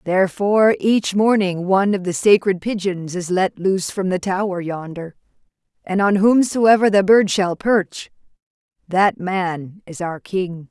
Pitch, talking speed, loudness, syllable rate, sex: 190 Hz, 150 wpm, -18 LUFS, 4.3 syllables/s, female